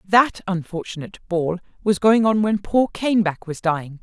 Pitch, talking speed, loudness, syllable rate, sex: 190 Hz, 165 wpm, -20 LUFS, 5.1 syllables/s, female